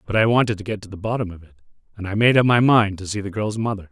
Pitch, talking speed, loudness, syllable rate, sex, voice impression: 105 Hz, 320 wpm, -20 LUFS, 7.1 syllables/s, male, very masculine, very adult-like, very middle-aged, very thick, tensed, very powerful, bright, soft, slightly muffled, fluent, cool, intellectual, very sincere, very calm, very mature, friendly, reassuring, unique, wild, slightly sweet, slightly lively, kind